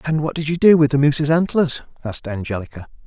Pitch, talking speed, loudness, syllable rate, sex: 140 Hz, 215 wpm, -18 LUFS, 6.5 syllables/s, male